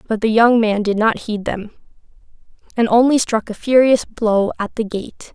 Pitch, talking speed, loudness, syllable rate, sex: 220 Hz, 190 wpm, -16 LUFS, 4.6 syllables/s, female